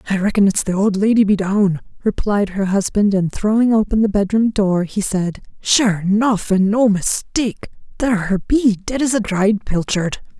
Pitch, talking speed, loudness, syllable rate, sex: 205 Hz, 180 wpm, -17 LUFS, 4.7 syllables/s, female